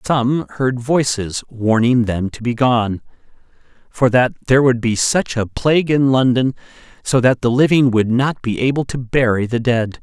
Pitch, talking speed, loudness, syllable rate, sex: 125 Hz, 180 wpm, -16 LUFS, 4.5 syllables/s, male